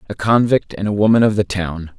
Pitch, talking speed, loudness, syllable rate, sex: 100 Hz, 240 wpm, -16 LUFS, 5.6 syllables/s, male